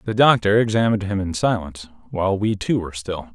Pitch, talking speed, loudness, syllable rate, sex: 100 Hz, 180 wpm, -20 LUFS, 6.4 syllables/s, male